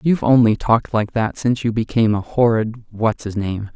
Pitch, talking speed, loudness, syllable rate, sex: 115 Hz, 210 wpm, -18 LUFS, 5.6 syllables/s, male